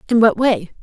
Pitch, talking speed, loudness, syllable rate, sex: 215 Hz, 220 wpm, -15 LUFS, 5.7 syllables/s, female